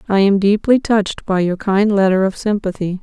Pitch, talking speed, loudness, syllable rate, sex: 200 Hz, 200 wpm, -16 LUFS, 5.3 syllables/s, female